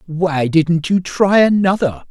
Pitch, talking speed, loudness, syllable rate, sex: 175 Hz, 145 wpm, -15 LUFS, 3.7 syllables/s, male